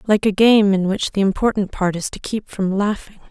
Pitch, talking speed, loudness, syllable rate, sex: 200 Hz, 235 wpm, -18 LUFS, 5.2 syllables/s, female